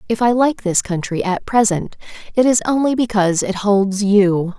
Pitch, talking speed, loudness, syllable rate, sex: 210 Hz, 185 wpm, -16 LUFS, 4.8 syllables/s, female